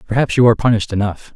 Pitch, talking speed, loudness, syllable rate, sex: 110 Hz, 220 wpm, -15 LUFS, 8.4 syllables/s, male